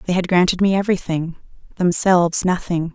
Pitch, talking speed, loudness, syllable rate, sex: 180 Hz, 140 wpm, -18 LUFS, 5.9 syllables/s, female